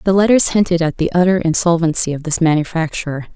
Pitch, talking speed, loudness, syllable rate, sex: 170 Hz, 180 wpm, -15 LUFS, 6.4 syllables/s, female